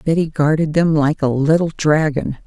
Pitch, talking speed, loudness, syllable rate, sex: 155 Hz, 170 wpm, -16 LUFS, 4.9 syllables/s, female